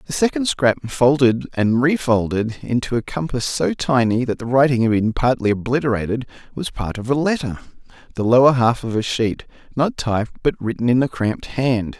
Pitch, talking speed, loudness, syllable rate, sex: 125 Hz, 180 wpm, -19 LUFS, 5.2 syllables/s, male